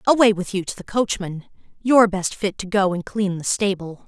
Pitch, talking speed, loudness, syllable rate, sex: 195 Hz, 220 wpm, -21 LUFS, 5.3 syllables/s, female